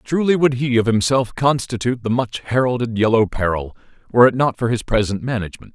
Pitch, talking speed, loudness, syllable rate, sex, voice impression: 120 Hz, 190 wpm, -18 LUFS, 6.1 syllables/s, male, masculine, adult-like, thick, powerful, bright, slightly muffled, slightly raspy, cool, intellectual, mature, wild, lively, strict